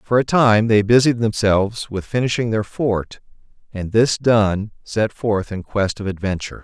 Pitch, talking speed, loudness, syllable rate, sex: 110 Hz, 170 wpm, -18 LUFS, 4.6 syllables/s, male